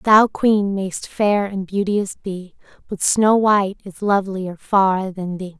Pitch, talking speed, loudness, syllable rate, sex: 195 Hz, 160 wpm, -19 LUFS, 3.7 syllables/s, female